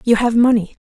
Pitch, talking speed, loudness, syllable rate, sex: 230 Hz, 215 wpm, -15 LUFS, 6.6 syllables/s, female